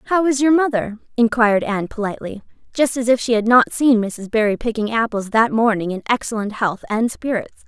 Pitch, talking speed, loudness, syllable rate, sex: 230 Hz, 195 wpm, -18 LUFS, 5.7 syllables/s, female